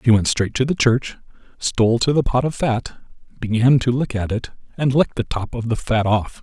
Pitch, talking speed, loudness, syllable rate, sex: 120 Hz, 235 wpm, -19 LUFS, 5.3 syllables/s, male